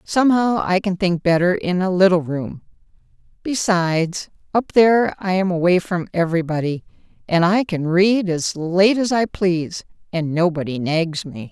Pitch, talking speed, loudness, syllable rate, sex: 180 Hz, 155 wpm, -19 LUFS, 4.7 syllables/s, female